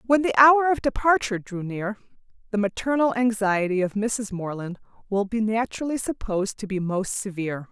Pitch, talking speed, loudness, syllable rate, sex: 220 Hz, 165 wpm, -24 LUFS, 5.3 syllables/s, female